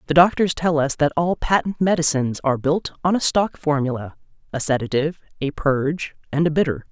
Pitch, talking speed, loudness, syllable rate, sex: 155 Hz, 175 wpm, -21 LUFS, 5.8 syllables/s, female